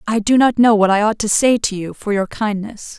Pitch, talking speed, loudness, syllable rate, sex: 215 Hz, 280 wpm, -16 LUFS, 5.3 syllables/s, female